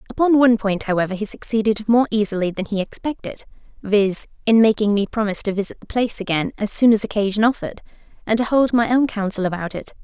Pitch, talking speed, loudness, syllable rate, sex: 215 Hz, 205 wpm, -19 LUFS, 6.4 syllables/s, female